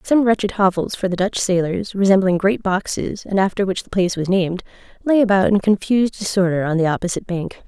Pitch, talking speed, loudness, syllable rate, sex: 195 Hz, 205 wpm, -18 LUFS, 6.0 syllables/s, female